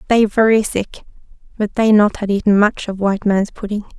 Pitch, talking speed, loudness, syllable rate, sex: 210 Hz, 195 wpm, -16 LUFS, 5.1 syllables/s, female